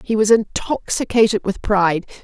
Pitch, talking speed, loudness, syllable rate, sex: 210 Hz, 135 wpm, -18 LUFS, 5.2 syllables/s, female